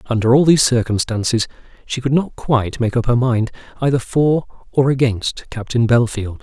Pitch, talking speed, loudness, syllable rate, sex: 120 Hz, 170 wpm, -17 LUFS, 5.2 syllables/s, male